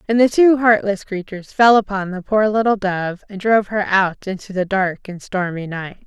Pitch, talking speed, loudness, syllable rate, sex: 200 Hz, 210 wpm, -17 LUFS, 5.1 syllables/s, female